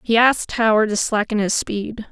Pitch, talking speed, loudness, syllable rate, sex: 220 Hz, 200 wpm, -19 LUFS, 5.1 syllables/s, female